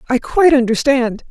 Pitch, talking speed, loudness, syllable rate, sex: 260 Hz, 140 wpm, -14 LUFS, 5.6 syllables/s, female